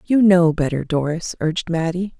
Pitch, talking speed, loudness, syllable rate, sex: 170 Hz, 165 wpm, -19 LUFS, 5.0 syllables/s, female